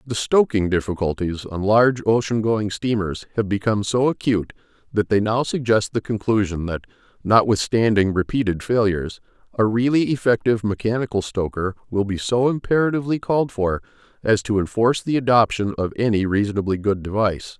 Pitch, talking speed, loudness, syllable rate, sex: 110 Hz, 145 wpm, -20 LUFS, 5.7 syllables/s, male